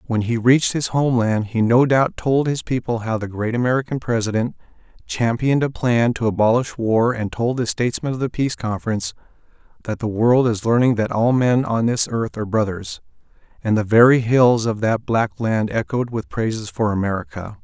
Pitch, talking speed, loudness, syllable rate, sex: 115 Hz, 190 wpm, -19 LUFS, 5.4 syllables/s, male